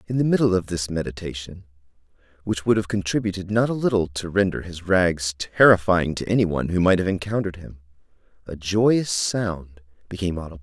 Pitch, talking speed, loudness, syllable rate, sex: 95 Hz, 175 wpm, -22 LUFS, 5.8 syllables/s, male